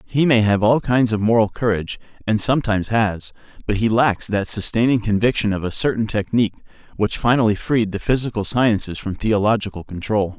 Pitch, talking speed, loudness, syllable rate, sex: 110 Hz, 175 wpm, -19 LUFS, 5.5 syllables/s, male